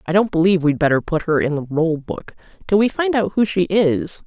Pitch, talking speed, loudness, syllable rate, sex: 180 Hz, 255 wpm, -18 LUFS, 5.5 syllables/s, female